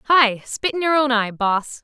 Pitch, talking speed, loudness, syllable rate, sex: 255 Hz, 230 wpm, -19 LUFS, 4.4 syllables/s, female